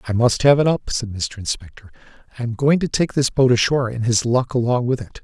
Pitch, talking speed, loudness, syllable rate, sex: 120 Hz, 250 wpm, -19 LUFS, 5.9 syllables/s, male